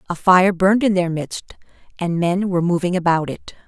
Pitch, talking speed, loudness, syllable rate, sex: 180 Hz, 195 wpm, -18 LUFS, 5.7 syllables/s, female